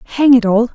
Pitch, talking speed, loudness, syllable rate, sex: 240 Hz, 240 wpm, -12 LUFS, 5.6 syllables/s, female